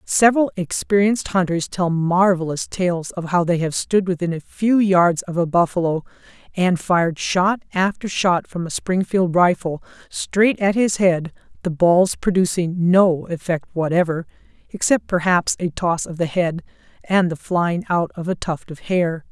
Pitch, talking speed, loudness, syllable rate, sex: 180 Hz, 165 wpm, -19 LUFS, 4.4 syllables/s, female